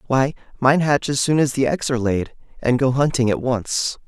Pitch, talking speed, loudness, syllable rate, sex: 130 Hz, 220 wpm, -20 LUFS, 5.1 syllables/s, male